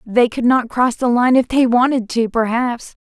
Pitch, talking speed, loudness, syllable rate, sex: 240 Hz, 210 wpm, -16 LUFS, 4.6 syllables/s, female